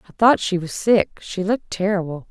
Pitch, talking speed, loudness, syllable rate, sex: 195 Hz, 180 wpm, -20 LUFS, 5.6 syllables/s, female